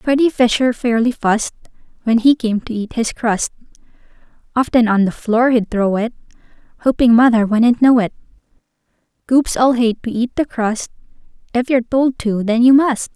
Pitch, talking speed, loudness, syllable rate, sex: 235 Hz, 170 wpm, -16 LUFS, 5.0 syllables/s, female